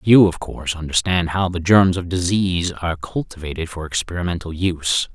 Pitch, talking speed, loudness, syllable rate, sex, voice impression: 85 Hz, 165 wpm, -20 LUFS, 5.6 syllables/s, male, masculine, adult-like, slightly thick, slightly refreshing, slightly unique